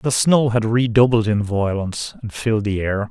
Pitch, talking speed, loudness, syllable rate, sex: 110 Hz, 195 wpm, -19 LUFS, 5.0 syllables/s, male